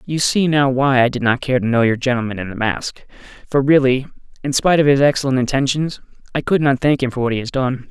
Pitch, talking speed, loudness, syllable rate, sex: 130 Hz, 250 wpm, -17 LUFS, 6.1 syllables/s, male